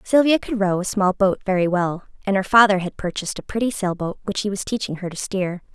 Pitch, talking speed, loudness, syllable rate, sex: 195 Hz, 240 wpm, -21 LUFS, 6.0 syllables/s, female